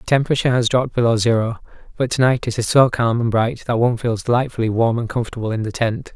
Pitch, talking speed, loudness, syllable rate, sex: 120 Hz, 245 wpm, -18 LUFS, 6.8 syllables/s, male